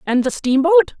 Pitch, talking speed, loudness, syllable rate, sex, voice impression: 295 Hz, 180 wpm, -16 LUFS, 4.8 syllables/s, female, feminine, middle-aged, tensed, clear, slightly halting, slightly intellectual, friendly, unique, lively, strict, intense